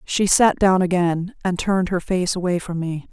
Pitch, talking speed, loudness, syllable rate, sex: 180 Hz, 210 wpm, -20 LUFS, 4.8 syllables/s, female